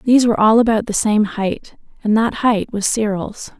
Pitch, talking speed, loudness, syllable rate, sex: 215 Hz, 200 wpm, -16 LUFS, 4.9 syllables/s, female